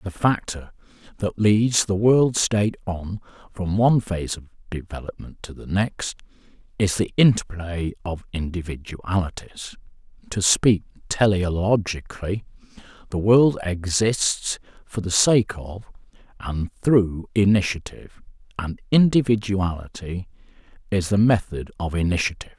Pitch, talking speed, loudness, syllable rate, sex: 95 Hz, 110 wpm, -22 LUFS, 4.4 syllables/s, male